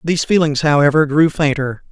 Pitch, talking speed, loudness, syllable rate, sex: 150 Hz, 155 wpm, -15 LUFS, 5.7 syllables/s, male